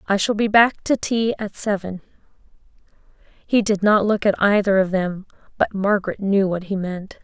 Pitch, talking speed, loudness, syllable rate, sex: 200 Hz, 185 wpm, -20 LUFS, 4.8 syllables/s, female